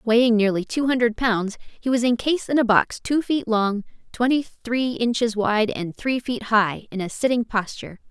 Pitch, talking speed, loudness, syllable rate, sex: 230 Hz, 190 wpm, -22 LUFS, 4.9 syllables/s, female